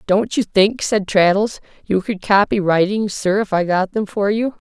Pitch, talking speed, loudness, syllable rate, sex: 200 Hz, 205 wpm, -17 LUFS, 4.5 syllables/s, female